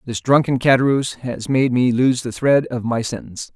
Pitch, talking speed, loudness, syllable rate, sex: 125 Hz, 200 wpm, -18 LUFS, 5.3 syllables/s, male